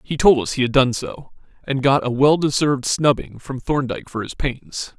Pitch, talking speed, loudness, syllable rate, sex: 135 Hz, 215 wpm, -19 LUFS, 5.0 syllables/s, male